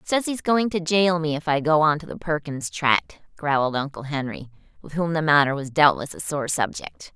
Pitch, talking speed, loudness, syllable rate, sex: 155 Hz, 220 wpm, -22 LUFS, 5.1 syllables/s, female